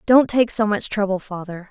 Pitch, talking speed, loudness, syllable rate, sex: 205 Hz, 210 wpm, -20 LUFS, 5.0 syllables/s, female